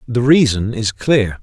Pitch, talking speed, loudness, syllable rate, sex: 115 Hz, 170 wpm, -15 LUFS, 3.9 syllables/s, male